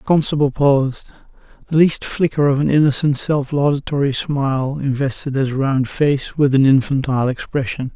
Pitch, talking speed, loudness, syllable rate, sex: 140 Hz, 150 wpm, -17 LUFS, 5.2 syllables/s, male